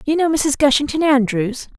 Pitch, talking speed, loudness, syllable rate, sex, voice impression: 280 Hz, 170 wpm, -17 LUFS, 5.2 syllables/s, female, feminine, slightly adult-like, slightly muffled, slightly fluent, friendly, slightly unique, slightly kind